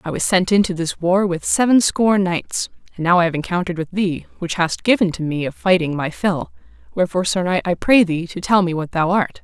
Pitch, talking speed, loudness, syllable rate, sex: 180 Hz, 240 wpm, -18 LUFS, 5.8 syllables/s, female